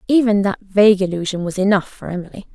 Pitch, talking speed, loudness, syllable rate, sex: 195 Hz, 190 wpm, -17 LUFS, 6.4 syllables/s, female